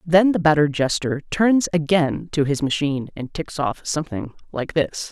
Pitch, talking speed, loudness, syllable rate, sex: 155 Hz, 175 wpm, -21 LUFS, 4.9 syllables/s, female